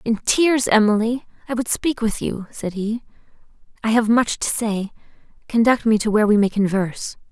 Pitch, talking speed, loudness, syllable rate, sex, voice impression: 225 Hz, 180 wpm, -20 LUFS, 5.1 syllables/s, female, feminine, slightly young, slightly soft, cute, calm, slightly kind